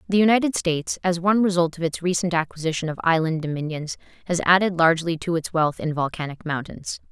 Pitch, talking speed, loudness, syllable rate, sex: 170 Hz, 185 wpm, -22 LUFS, 6.2 syllables/s, female